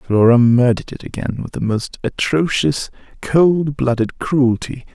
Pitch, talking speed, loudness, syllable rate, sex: 130 Hz, 135 wpm, -17 LUFS, 4.2 syllables/s, male